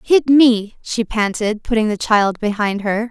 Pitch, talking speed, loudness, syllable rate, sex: 220 Hz, 175 wpm, -16 LUFS, 4.1 syllables/s, female